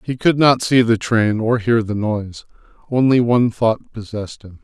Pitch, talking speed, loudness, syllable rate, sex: 115 Hz, 195 wpm, -17 LUFS, 4.9 syllables/s, male